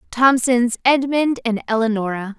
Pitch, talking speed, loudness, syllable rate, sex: 240 Hz, 100 wpm, -18 LUFS, 4.5 syllables/s, female